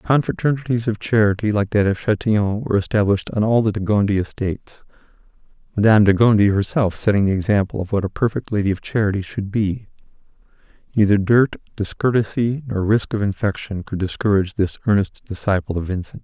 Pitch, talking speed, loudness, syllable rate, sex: 105 Hz, 165 wpm, -19 LUFS, 6.0 syllables/s, male